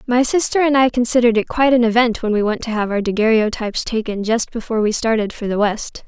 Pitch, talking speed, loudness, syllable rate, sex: 230 Hz, 235 wpm, -17 LUFS, 6.4 syllables/s, female